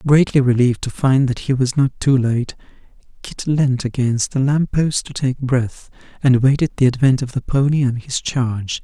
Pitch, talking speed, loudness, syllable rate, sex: 130 Hz, 195 wpm, -18 LUFS, 4.8 syllables/s, male